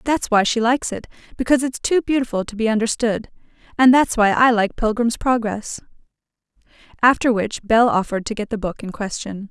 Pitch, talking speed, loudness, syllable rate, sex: 230 Hz, 175 wpm, -19 LUFS, 5.7 syllables/s, female